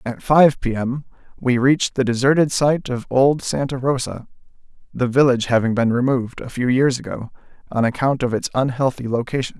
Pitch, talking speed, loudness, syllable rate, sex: 130 Hz, 175 wpm, -19 LUFS, 5.5 syllables/s, male